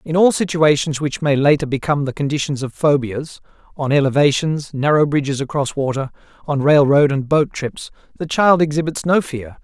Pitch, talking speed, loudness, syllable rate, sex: 145 Hz, 170 wpm, -17 LUFS, 5.3 syllables/s, male